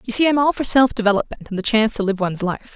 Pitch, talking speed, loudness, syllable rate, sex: 225 Hz, 305 wpm, -18 LUFS, 7.3 syllables/s, female